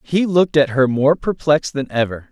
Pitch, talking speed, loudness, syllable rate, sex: 145 Hz, 205 wpm, -17 LUFS, 5.4 syllables/s, male